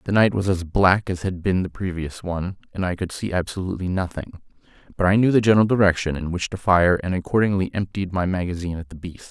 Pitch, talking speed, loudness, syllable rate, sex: 95 Hz, 225 wpm, -22 LUFS, 6.3 syllables/s, male